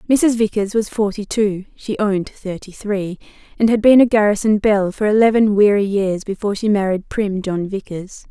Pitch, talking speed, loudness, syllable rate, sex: 205 Hz, 190 wpm, -17 LUFS, 4.8 syllables/s, female